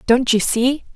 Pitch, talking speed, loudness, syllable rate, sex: 245 Hz, 190 wpm, -17 LUFS, 4.0 syllables/s, female